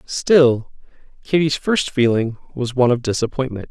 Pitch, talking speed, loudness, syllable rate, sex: 130 Hz, 130 wpm, -18 LUFS, 4.8 syllables/s, male